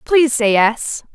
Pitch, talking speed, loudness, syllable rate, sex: 250 Hz, 155 wpm, -15 LUFS, 4.2 syllables/s, female